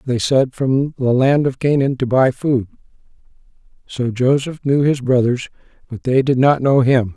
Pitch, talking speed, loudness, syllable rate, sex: 130 Hz, 175 wpm, -16 LUFS, 4.5 syllables/s, male